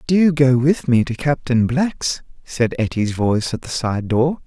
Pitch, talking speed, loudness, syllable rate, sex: 130 Hz, 190 wpm, -18 LUFS, 4.1 syllables/s, male